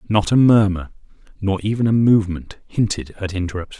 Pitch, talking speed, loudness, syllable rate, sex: 100 Hz, 160 wpm, -18 LUFS, 5.8 syllables/s, male